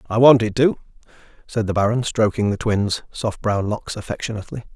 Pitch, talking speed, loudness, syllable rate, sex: 110 Hz, 165 wpm, -20 LUFS, 5.7 syllables/s, male